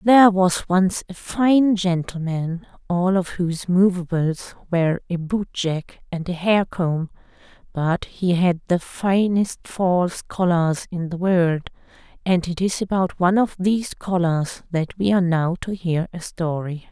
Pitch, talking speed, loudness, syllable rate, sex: 180 Hz, 155 wpm, -21 LUFS, 4.1 syllables/s, female